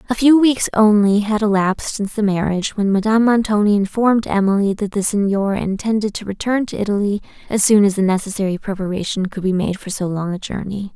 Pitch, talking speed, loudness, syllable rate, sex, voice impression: 205 Hz, 195 wpm, -17 LUFS, 6.0 syllables/s, female, feminine, slightly young, slightly soft, cute, calm, slightly kind